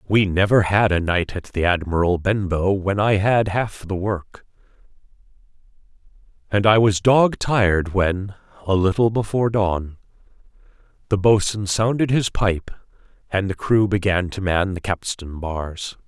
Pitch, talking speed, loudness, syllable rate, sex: 100 Hz, 145 wpm, -20 LUFS, 4.3 syllables/s, male